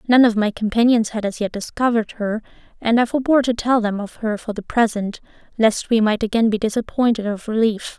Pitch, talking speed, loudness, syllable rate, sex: 225 Hz, 210 wpm, -19 LUFS, 5.8 syllables/s, female